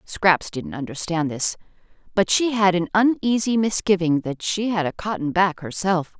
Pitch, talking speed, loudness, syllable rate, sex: 185 Hz, 165 wpm, -21 LUFS, 4.6 syllables/s, female